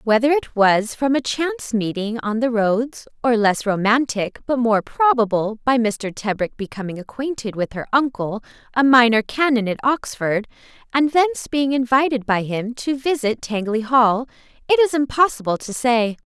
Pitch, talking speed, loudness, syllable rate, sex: 240 Hz, 160 wpm, -19 LUFS, 4.7 syllables/s, female